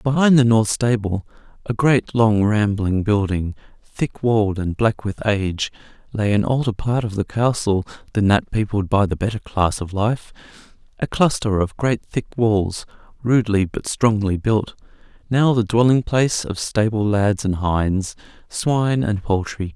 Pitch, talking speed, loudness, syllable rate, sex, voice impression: 110 Hz, 160 wpm, -20 LUFS, 4.4 syllables/s, male, masculine, adult-like, slightly dark, slightly cool, slightly sincere, calm, slightly kind